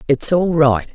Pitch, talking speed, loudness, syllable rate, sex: 150 Hz, 190 wpm, -15 LUFS, 4.1 syllables/s, female